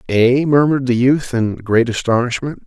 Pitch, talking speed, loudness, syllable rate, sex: 125 Hz, 155 wpm, -16 LUFS, 4.9 syllables/s, male